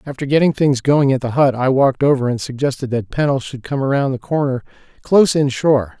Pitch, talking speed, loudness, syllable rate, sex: 135 Hz, 220 wpm, -17 LUFS, 5.8 syllables/s, male